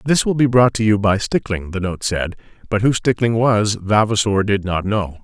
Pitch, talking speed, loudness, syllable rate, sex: 105 Hz, 220 wpm, -17 LUFS, 4.8 syllables/s, male